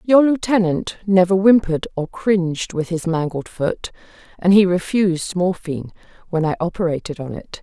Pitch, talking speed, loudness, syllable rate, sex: 180 Hz, 150 wpm, -19 LUFS, 5.1 syllables/s, female